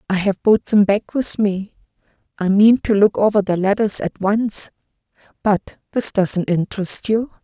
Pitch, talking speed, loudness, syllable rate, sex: 205 Hz, 160 wpm, -18 LUFS, 4.4 syllables/s, female